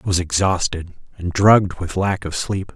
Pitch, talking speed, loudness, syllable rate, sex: 90 Hz, 195 wpm, -19 LUFS, 5.0 syllables/s, male